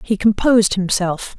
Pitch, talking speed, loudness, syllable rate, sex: 200 Hz, 130 wpm, -16 LUFS, 4.7 syllables/s, female